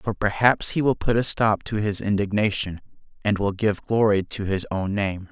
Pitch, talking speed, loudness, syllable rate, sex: 105 Hz, 205 wpm, -23 LUFS, 4.8 syllables/s, male